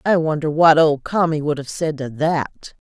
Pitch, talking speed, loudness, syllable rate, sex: 155 Hz, 210 wpm, -18 LUFS, 4.5 syllables/s, female